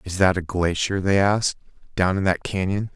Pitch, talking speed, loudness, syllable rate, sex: 95 Hz, 205 wpm, -22 LUFS, 5.3 syllables/s, male